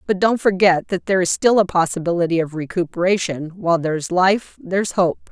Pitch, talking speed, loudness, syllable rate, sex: 180 Hz, 180 wpm, -19 LUFS, 5.8 syllables/s, female